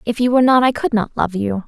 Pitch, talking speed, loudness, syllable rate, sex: 235 Hz, 320 wpm, -16 LUFS, 6.5 syllables/s, female